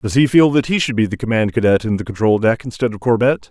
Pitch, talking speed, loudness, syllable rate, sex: 115 Hz, 290 wpm, -16 LUFS, 6.3 syllables/s, male